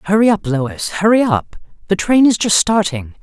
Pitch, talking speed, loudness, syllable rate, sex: 190 Hz, 185 wpm, -15 LUFS, 4.8 syllables/s, female